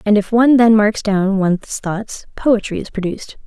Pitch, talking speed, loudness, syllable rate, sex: 210 Hz, 190 wpm, -16 LUFS, 5.0 syllables/s, female